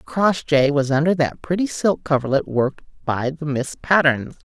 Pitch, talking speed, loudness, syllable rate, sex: 150 Hz, 160 wpm, -20 LUFS, 4.9 syllables/s, female